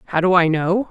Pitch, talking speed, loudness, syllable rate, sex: 180 Hz, 265 wpm, -17 LUFS, 6.2 syllables/s, female